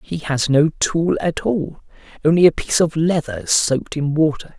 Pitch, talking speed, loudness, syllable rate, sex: 155 Hz, 185 wpm, -18 LUFS, 4.7 syllables/s, male